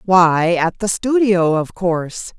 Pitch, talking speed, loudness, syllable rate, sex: 185 Hz, 150 wpm, -16 LUFS, 3.6 syllables/s, female